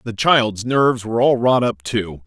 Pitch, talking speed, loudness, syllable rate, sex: 115 Hz, 210 wpm, -17 LUFS, 4.7 syllables/s, male